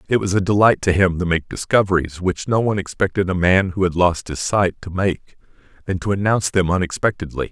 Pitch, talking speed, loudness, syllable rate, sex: 95 Hz, 215 wpm, -19 LUFS, 5.9 syllables/s, male